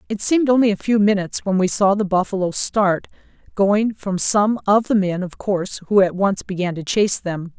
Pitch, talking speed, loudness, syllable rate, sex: 200 Hz, 215 wpm, -19 LUFS, 5.4 syllables/s, female